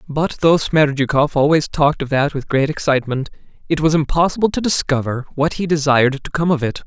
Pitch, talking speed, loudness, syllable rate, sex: 150 Hz, 190 wpm, -17 LUFS, 5.9 syllables/s, male